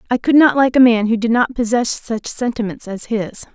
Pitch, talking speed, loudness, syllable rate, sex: 230 Hz, 235 wpm, -16 LUFS, 5.2 syllables/s, female